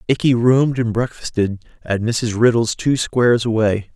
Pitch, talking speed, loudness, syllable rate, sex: 115 Hz, 150 wpm, -17 LUFS, 4.7 syllables/s, male